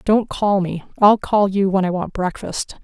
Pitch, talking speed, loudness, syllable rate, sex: 195 Hz, 210 wpm, -18 LUFS, 4.4 syllables/s, female